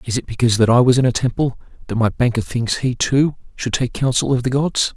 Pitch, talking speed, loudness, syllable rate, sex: 125 Hz, 255 wpm, -18 LUFS, 5.9 syllables/s, male